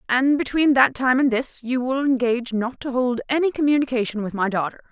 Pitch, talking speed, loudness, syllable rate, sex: 255 Hz, 210 wpm, -21 LUFS, 5.7 syllables/s, female